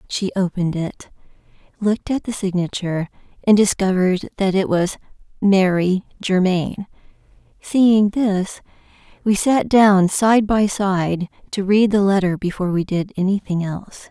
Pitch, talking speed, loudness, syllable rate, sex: 195 Hz, 130 wpm, -18 LUFS, 4.7 syllables/s, female